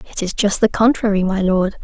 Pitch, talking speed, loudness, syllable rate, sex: 200 Hz, 230 wpm, -17 LUFS, 5.6 syllables/s, female